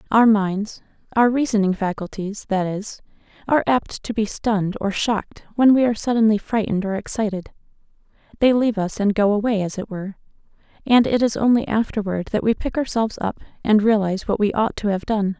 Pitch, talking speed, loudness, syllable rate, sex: 210 Hz, 180 wpm, -20 LUFS, 5.8 syllables/s, female